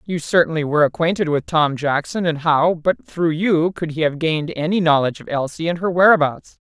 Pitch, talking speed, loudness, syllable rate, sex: 160 Hz, 205 wpm, -18 LUFS, 5.6 syllables/s, female